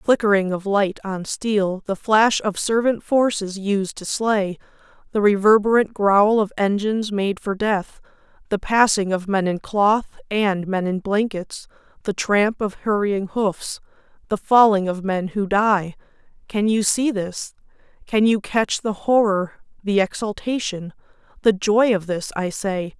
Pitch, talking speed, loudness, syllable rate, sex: 205 Hz, 150 wpm, -20 LUFS, 4.0 syllables/s, female